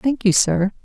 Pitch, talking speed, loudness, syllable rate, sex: 210 Hz, 215 wpm, -17 LUFS, 4.2 syllables/s, female